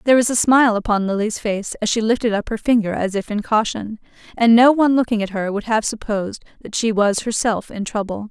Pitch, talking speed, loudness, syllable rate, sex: 220 Hz, 230 wpm, -18 LUFS, 6.0 syllables/s, female